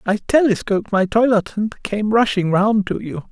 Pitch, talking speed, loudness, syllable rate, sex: 210 Hz, 180 wpm, -18 LUFS, 4.8 syllables/s, male